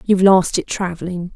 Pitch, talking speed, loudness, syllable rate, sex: 180 Hz, 175 wpm, -17 LUFS, 5.6 syllables/s, female